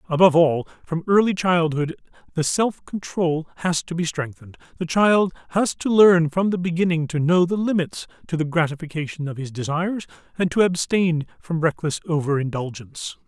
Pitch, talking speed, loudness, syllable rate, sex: 165 Hz, 165 wpm, -21 LUFS, 5.3 syllables/s, male